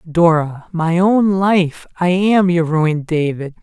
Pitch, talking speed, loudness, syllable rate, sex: 170 Hz, 150 wpm, -15 LUFS, 3.7 syllables/s, male